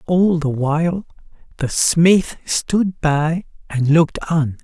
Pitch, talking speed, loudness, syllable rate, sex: 160 Hz, 130 wpm, -18 LUFS, 3.3 syllables/s, male